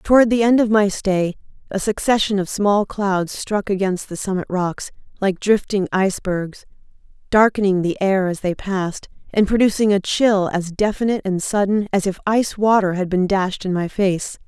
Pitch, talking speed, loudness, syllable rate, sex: 195 Hz, 180 wpm, -19 LUFS, 4.9 syllables/s, female